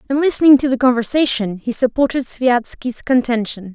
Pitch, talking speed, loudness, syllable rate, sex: 250 Hz, 145 wpm, -16 LUFS, 5.3 syllables/s, female